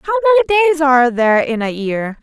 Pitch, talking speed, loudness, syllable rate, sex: 295 Hz, 215 wpm, -14 LUFS, 6.2 syllables/s, female